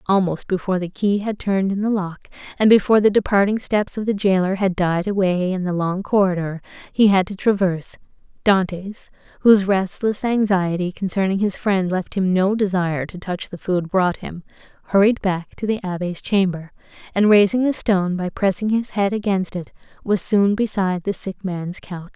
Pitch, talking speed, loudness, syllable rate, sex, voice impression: 190 Hz, 185 wpm, -20 LUFS, 5.2 syllables/s, female, very feminine, slightly adult-like, slightly thin, slightly relaxed, slightly powerful, slightly bright, soft, clear, fluent, very cute, slightly cool, very intellectual, refreshing, sincere, very calm, very friendly, very reassuring, unique, very elegant, slightly wild, very sweet, lively, very kind, slightly modest, slightly light